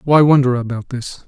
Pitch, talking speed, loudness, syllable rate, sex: 130 Hz, 190 wpm, -15 LUFS, 5.1 syllables/s, male